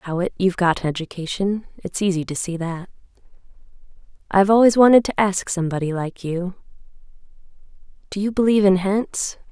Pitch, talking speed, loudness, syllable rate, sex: 190 Hz, 140 wpm, -20 LUFS, 5.7 syllables/s, female